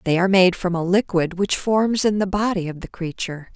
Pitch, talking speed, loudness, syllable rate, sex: 185 Hz, 235 wpm, -20 LUFS, 5.6 syllables/s, female